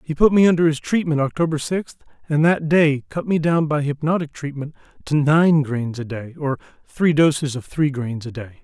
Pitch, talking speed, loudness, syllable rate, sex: 150 Hz, 210 wpm, -20 LUFS, 5.1 syllables/s, male